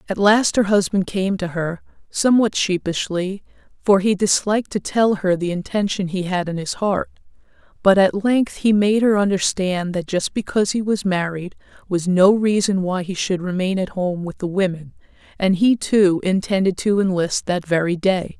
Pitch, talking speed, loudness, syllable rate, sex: 190 Hz, 185 wpm, -19 LUFS, 4.8 syllables/s, female